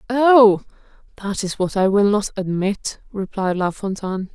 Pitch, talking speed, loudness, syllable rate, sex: 200 Hz, 150 wpm, -19 LUFS, 4.4 syllables/s, female